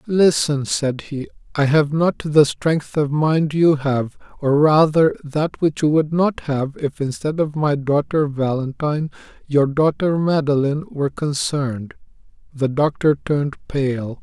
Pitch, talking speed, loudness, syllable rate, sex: 145 Hz, 150 wpm, -19 LUFS, 4.2 syllables/s, male